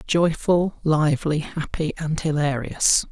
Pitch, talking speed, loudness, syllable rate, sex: 155 Hz, 95 wpm, -22 LUFS, 3.8 syllables/s, male